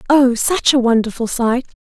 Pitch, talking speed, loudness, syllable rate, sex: 250 Hz, 165 wpm, -15 LUFS, 4.7 syllables/s, female